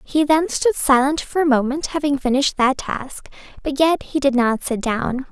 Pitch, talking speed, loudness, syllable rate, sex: 275 Hz, 205 wpm, -19 LUFS, 4.7 syllables/s, female